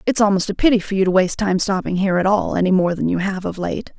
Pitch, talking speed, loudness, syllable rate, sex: 195 Hz, 300 wpm, -18 LUFS, 6.8 syllables/s, female